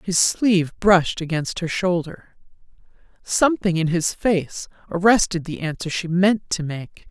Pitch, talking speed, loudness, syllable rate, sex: 180 Hz, 145 wpm, -20 LUFS, 4.4 syllables/s, female